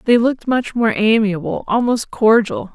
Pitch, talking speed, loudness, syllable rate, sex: 225 Hz, 155 wpm, -16 LUFS, 4.7 syllables/s, female